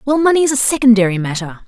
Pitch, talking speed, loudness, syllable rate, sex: 240 Hz, 215 wpm, -13 LUFS, 7.1 syllables/s, female